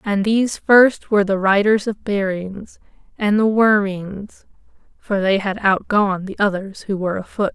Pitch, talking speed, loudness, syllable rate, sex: 200 Hz, 175 wpm, -18 LUFS, 3.1 syllables/s, female